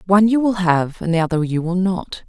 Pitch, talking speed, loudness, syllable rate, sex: 185 Hz, 265 wpm, -18 LUFS, 5.7 syllables/s, female